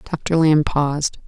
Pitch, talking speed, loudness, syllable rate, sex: 150 Hz, 140 wpm, -18 LUFS, 3.6 syllables/s, female